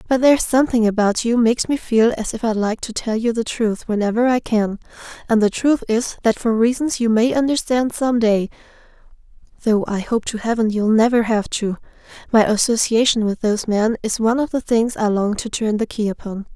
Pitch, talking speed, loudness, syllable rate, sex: 225 Hz, 205 wpm, -18 LUFS, 5.5 syllables/s, female